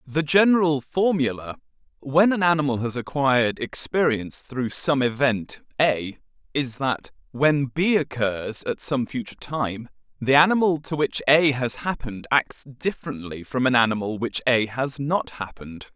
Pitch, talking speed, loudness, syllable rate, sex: 135 Hz, 145 wpm, -23 LUFS, 4.6 syllables/s, male